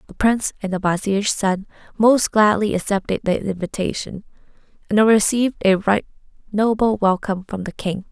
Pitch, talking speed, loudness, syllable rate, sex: 205 Hz, 150 wpm, -19 LUFS, 5.2 syllables/s, female